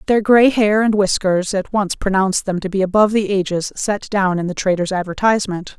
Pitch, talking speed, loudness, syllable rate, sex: 195 Hz, 205 wpm, -17 LUFS, 5.6 syllables/s, female